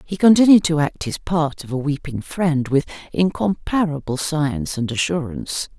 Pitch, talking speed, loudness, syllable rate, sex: 160 Hz, 155 wpm, -20 LUFS, 4.8 syllables/s, female